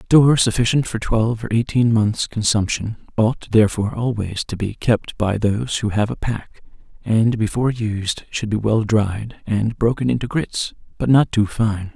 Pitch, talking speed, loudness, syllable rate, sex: 110 Hz, 175 wpm, -19 LUFS, 4.7 syllables/s, male